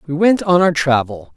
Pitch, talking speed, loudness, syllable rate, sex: 160 Hz, 220 wpm, -15 LUFS, 5.0 syllables/s, male